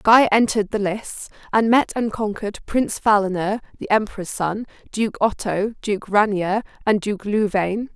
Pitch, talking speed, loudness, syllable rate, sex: 210 Hz, 150 wpm, -21 LUFS, 4.7 syllables/s, female